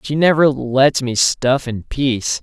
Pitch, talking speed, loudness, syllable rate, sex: 135 Hz, 175 wpm, -16 LUFS, 3.9 syllables/s, male